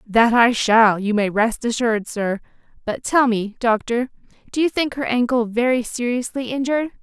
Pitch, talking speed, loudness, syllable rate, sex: 235 Hz, 170 wpm, -19 LUFS, 4.9 syllables/s, female